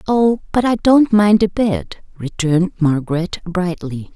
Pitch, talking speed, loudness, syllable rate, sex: 185 Hz, 145 wpm, -16 LUFS, 4.1 syllables/s, female